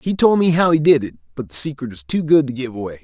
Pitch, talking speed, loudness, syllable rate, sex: 145 Hz, 315 wpm, -17 LUFS, 6.4 syllables/s, male